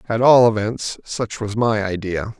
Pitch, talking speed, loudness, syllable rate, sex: 110 Hz, 175 wpm, -19 LUFS, 4.2 syllables/s, male